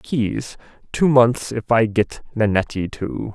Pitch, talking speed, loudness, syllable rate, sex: 115 Hz, 145 wpm, -20 LUFS, 3.6 syllables/s, male